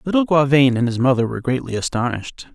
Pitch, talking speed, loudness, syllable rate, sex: 135 Hz, 190 wpm, -18 LUFS, 6.7 syllables/s, male